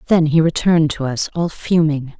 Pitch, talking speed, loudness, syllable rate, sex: 155 Hz, 190 wpm, -17 LUFS, 5.2 syllables/s, female